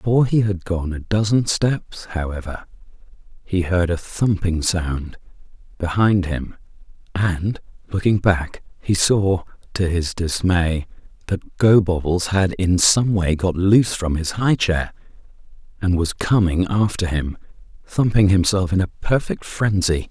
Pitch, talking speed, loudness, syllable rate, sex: 95 Hz, 135 wpm, -20 LUFS, 4.1 syllables/s, male